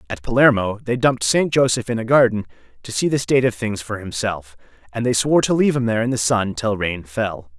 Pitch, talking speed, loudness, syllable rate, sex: 115 Hz, 235 wpm, -19 LUFS, 6.1 syllables/s, male